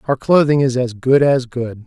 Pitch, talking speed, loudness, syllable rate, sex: 130 Hz, 225 wpm, -15 LUFS, 4.7 syllables/s, male